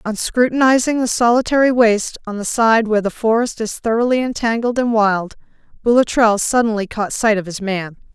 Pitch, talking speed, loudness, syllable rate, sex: 225 Hz, 170 wpm, -16 LUFS, 5.6 syllables/s, female